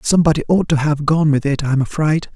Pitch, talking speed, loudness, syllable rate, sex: 150 Hz, 230 wpm, -16 LUFS, 6.0 syllables/s, male